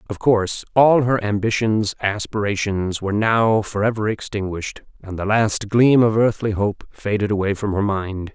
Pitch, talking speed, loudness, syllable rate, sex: 105 Hz, 160 wpm, -19 LUFS, 4.7 syllables/s, male